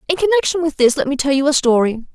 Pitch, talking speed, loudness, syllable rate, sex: 290 Hz, 280 wpm, -16 LUFS, 6.8 syllables/s, female